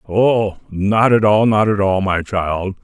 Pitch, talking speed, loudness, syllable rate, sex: 100 Hz, 190 wpm, -16 LUFS, 3.6 syllables/s, male